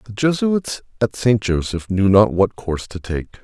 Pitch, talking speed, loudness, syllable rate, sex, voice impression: 105 Hz, 190 wpm, -19 LUFS, 4.8 syllables/s, male, very masculine, slightly old, very thick, very tensed, very powerful, dark, very soft, very muffled, fluent, raspy, very cool, intellectual, sincere, very calm, very mature, very friendly, reassuring, very unique, slightly elegant, very wild, sweet, slightly lively, very kind, modest